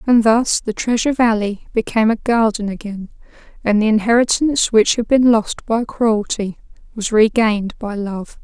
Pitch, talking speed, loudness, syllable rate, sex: 220 Hz, 155 wpm, -17 LUFS, 4.9 syllables/s, female